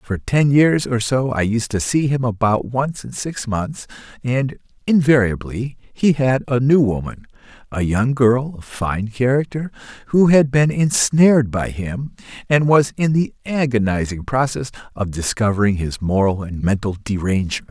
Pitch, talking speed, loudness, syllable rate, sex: 120 Hz, 160 wpm, -18 LUFS, 4.4 syllables/s, male